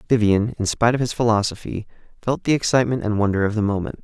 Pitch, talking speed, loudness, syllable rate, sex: 110 Hz, 210 wpm, -20 LUFS, 7.0 syllables/s, male